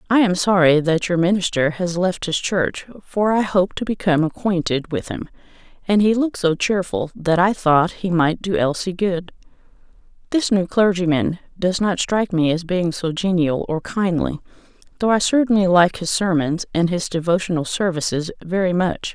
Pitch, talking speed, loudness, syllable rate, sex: 180 Hz, 175 wpm, -19 LUFS, 5.0 syllables/s, female